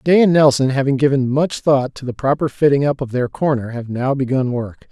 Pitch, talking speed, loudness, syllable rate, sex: 135 Hz, 230 wpm, -17 LUFS, 5.3 syllables/s, male